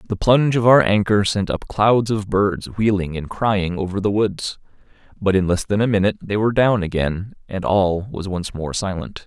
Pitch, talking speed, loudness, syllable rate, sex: 100 Hz, 205 wpm, -19 LUFS, 4.8 syllables/s, male